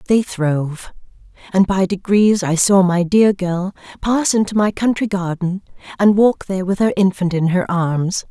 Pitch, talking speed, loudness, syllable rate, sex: 190 Hz, 175 wpm, -17 LUFS, 4.5 syllables/s, female